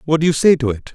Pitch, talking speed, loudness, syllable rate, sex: 145 Hz, 380 wpm, -16 LUFS, 7.2 syllables/s, male